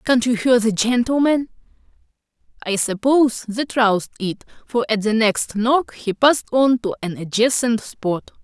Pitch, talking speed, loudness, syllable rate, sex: 235 Hz, 155 wpm, -19 LUFS, 4.5 syllables/s, female